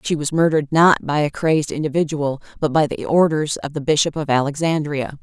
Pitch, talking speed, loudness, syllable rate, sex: 150 Hz, 195 wpm, -19 LUFS, 5.8 syllables/s, female